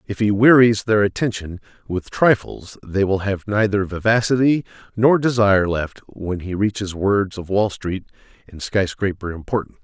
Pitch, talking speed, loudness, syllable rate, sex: 100 Hz, 150 wpm, -19 LUFS, 4.8 syllables/s, male